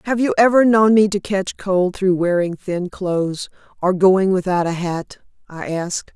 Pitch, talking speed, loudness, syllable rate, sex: 190 Hz, 185 wpm, -18 LUFS, 4.5 syllables/s, female